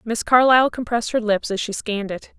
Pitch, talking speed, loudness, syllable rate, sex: 225 Hz, 225 wpm, -19 LUFS, 6.2 syllables/s, female